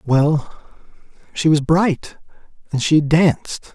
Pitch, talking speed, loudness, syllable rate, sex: 155 Hz, 110 wpm, -17 LUFS, 3.5 syllables/s, male